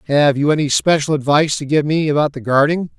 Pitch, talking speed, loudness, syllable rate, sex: 145 Hz, 220 wpm, -16 LUFS, 6.2 syllables/s, male